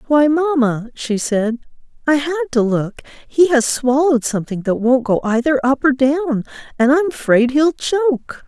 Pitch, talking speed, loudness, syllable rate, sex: 265 Hz, 170 wpm, -16 LUFS, 4.5 syllables/s, female